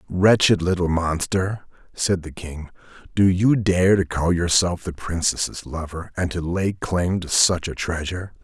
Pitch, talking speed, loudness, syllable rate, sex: 90 Hz, 165 wpm, -21 LUFS, 4.2 syllables/s, male